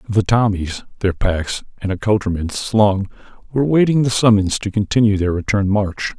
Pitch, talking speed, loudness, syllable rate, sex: 105 Hz, 155 wpm, -18 LUFS, 5.0 syllables/s, male